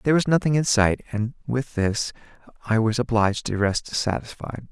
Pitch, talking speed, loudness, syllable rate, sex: 115 Hz, 180 wpm, -23 LUFS, 5.2 syllables/s, male